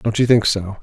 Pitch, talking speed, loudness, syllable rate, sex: 110 Hz, 290 wpm, -16 LUFS, 5.3 syllables/s, male